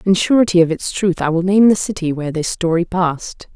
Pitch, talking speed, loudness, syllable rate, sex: 180 Hz, 235 wpm, -16 LUFS, 5.9 syllables/s, female